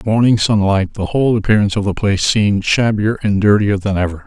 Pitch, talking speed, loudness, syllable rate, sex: 105 Hz, 225 wpm, -15 LUFS, 6.4 syllables/s, male